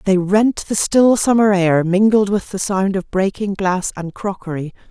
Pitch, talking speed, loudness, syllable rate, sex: 195 Hz, 185 wpm, -17 LUFS, 4.4 syllables/s, female